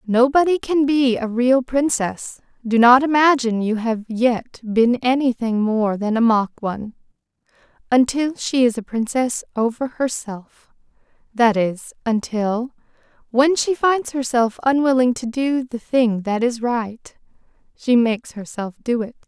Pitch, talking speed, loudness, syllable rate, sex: 240 Hz, 140 wpm, -19 LUFS, 4.2 syllables/s, female